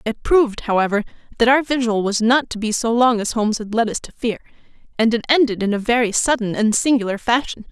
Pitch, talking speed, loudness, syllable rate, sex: 230 Hz, 225 wpm, -18 LUFS, 6.1 syllables/s, female